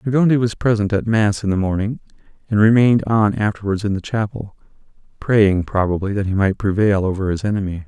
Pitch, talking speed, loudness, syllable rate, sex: 105 Hz, 190 wpm, -18 LUFS, 5.8 syllables/s, male